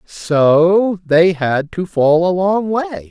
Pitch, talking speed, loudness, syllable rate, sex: 175 Hz, 155 wpm, -14 LUFS, 2.7 syllables/s, male